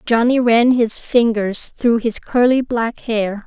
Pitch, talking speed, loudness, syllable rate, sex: 230 Hz, 155 wpm, -16 LUFS, 3.6 syllables/s, female